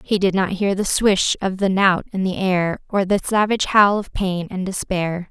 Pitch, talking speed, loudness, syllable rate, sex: 190 Hz, 225 wpm, -19 LUFS, 4.6 syllables/s, female